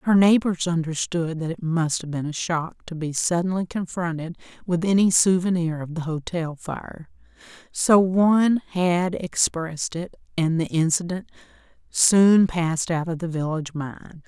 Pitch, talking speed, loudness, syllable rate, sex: 170 Hz, 145 wpm, -22 LUFS, 4.5 syllables/s, female